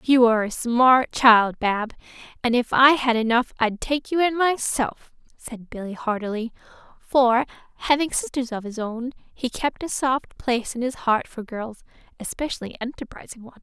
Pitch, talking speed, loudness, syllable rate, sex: 245 Hz, 165 wpm, -22 LUFS, 4.7 syllables/s, female